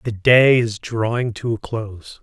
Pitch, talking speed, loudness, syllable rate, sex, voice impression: 110 Hz, 190 wpm, -18 LUFS, 4.3 syllables/s, male, masculine, very adult-like, slightly thick, cool, slightly intellectual